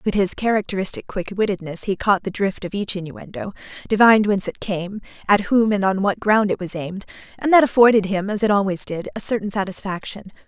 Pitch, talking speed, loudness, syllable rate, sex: 200 Hz, 200 wpm, -20 LUFS, 6.0 syllables/s, female